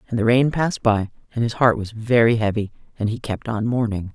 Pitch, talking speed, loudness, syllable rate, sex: 115 Hz, 230 wpm, -21 LUFS, 5.8 syllables/s, female